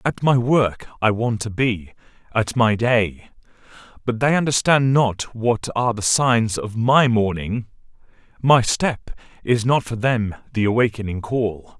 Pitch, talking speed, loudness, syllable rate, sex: 115 Hz, 145 wpm, -20 LUFS, 4.1 syllables/s, male